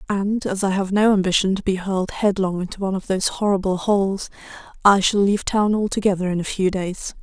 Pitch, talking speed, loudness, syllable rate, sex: 195 Hz, 210 wpm, -20 LUFS, 6.0 syllables/s, female